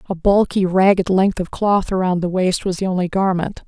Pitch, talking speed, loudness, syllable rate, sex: 185 Hz, 210 wpm, -18 LUFS, 5.2 syllables/s, female